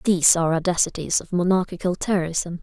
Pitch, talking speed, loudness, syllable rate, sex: 175 Hz, 135 wpm, -21 LUFS, 6.2 syllables/s, female